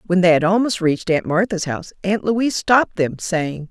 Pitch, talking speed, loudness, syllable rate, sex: 185 Hz, 210 wpm, -18 LUFS, 5.6 syllables/s, female